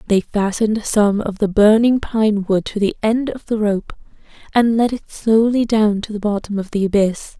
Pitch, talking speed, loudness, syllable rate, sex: 210 Hz, 205 wpm, -17 LUFS, 4.7 syllables/s, female